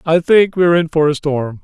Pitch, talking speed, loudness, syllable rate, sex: 160 Hz, 255 wpm, -14 LUFS, 5.3 syllables/s, male